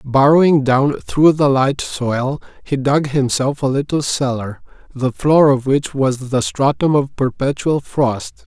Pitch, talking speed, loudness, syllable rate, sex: 135 Hz, 155 wpm, -16 LUFS, 3.8 syllables/s, male